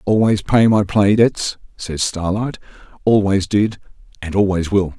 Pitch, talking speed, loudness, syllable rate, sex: 100 Hz, 145 wpm, -17 LUFS, 4.3 syllables/s, male